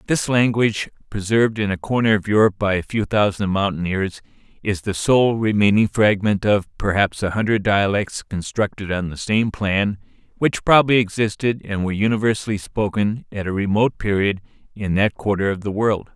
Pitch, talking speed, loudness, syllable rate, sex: 105 Hz, 165 wpm, -20 LUFS, 5.3 syllables/s, male